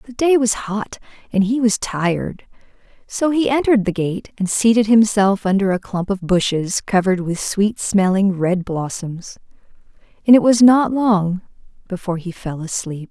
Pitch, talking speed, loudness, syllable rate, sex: 205 Hz, 165 wpm, -17 LUFS, 4.7 syllables/s, female